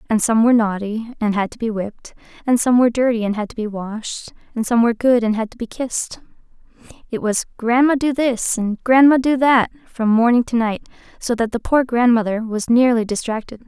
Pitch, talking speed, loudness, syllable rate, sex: 230 Hz, 210 wpm, -18 LUFS, 5.6 syllables/s, female